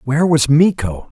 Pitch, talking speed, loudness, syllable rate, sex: 145 Hz, 150 wpm, -14 LUFS, 5.0 syllables/s, male